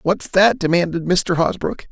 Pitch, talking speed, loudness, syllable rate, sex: 170 Hz, 155 wpm, -17 LUFS, 4.5 syllables/s, male